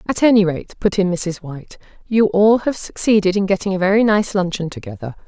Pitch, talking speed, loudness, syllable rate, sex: 195 Hz, 205 wpm, -17 LUFS, 5.7 syllables/s, female